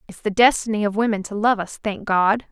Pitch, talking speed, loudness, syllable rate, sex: 210 Hz, 240 wpm, -20 LUFS, 5.5 syllables/s, female